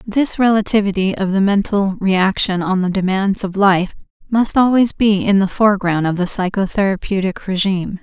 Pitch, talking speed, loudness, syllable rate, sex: 195 Hz, 155 wpm, -16 LUFS, 5.1 syllables/s, female